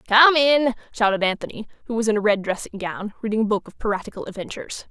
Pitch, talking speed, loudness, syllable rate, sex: 220 Hz, 210 wpm, -22 LUFS, 6.6 syllables/s, female